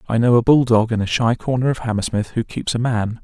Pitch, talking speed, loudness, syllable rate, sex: 115 Hz, 280 wpm, -18 LUFS, 5.9 syllables/s, male